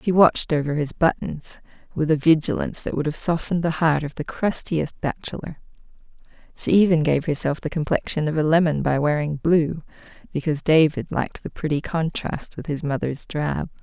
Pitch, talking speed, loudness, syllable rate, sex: 155 Hz, 175 wpm, -22 LUFS, 5.5 syllables/s, female